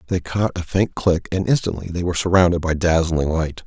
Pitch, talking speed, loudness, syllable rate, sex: 85 Hz, 215 wpm, -20 LUFS, 5.5 syllables/s, male